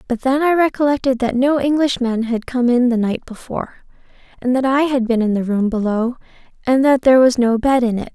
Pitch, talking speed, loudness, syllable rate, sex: 250 Hz, 220 wpm, -17 LUFS, 5.6 syllables/s, female